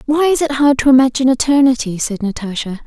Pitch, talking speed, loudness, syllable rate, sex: 260 Hz, 190 wpm, -14 LUFS, 6.3 syllables/s, female